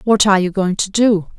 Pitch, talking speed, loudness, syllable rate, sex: 200 Hz, 260 wpm, -15 LUFS, 5.7 syllables/s, female